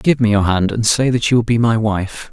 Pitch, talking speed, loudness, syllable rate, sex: 110 Hz, 310 wpm, -15 LUFS, 5.3 syllables/s, male